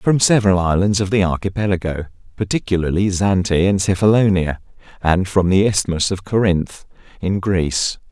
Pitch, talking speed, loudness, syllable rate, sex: 95 Hz, 135 wpm, -17 LUFS, 5.2 syllables/s, male